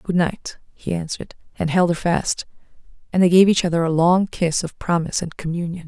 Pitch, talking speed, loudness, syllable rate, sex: 170 Hz, 205 wpm, -20 LUFS, 5.6 syllables/s, female